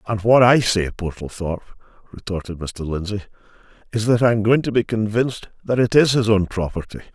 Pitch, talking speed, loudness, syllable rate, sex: 105 Hz, 175 wpm, -19 LUFS, 5.8 syllables/s, male